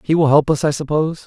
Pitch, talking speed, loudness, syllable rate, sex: 150 Hz, 285 wpm, -16 LUFS, 6.8 syllables/s, male